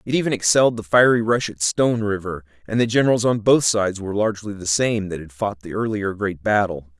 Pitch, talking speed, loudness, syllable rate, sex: 105 Hz, 225 wpm, -20 LUFS, 6.1 syllables/s, male